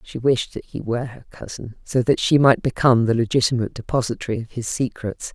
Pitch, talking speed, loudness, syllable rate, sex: 120 Hz, 200 wpm, -21 LUFS, 6.0 syllables/s, female